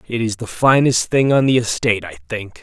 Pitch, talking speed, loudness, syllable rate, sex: 115 Hz, 230 wpm, -17 LUFS, 5.6 syllables/s, male